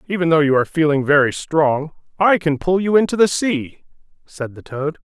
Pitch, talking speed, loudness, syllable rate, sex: 160 Hz, 200 wpm, -17 LUFS, 5.3 syllables/s, male